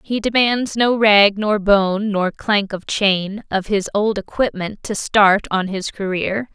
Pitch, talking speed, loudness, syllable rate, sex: 205 Hz, 175 wpm, -17 LUFS, 3.6 syllables/s, female